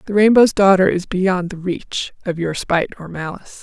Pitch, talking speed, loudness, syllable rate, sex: 185 Hz, 200 wpm, -17 LUFS, 5.1 syllables/s, female